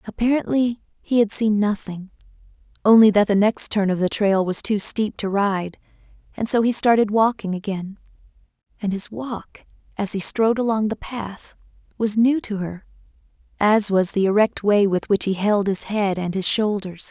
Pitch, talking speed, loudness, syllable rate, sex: 205 Hz, 175 wpm, -20 LUFS, 4.8 syllables/s, female